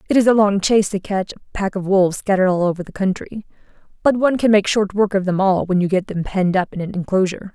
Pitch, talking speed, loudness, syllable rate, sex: 195 Hz, 270 wpm, -18 LUFS, 6.8 syllables/s, female